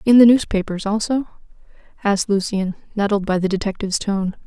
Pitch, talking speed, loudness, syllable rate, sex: 205 Hz, 150 wpm, -19 LUFS, 6.0 syllables/s, female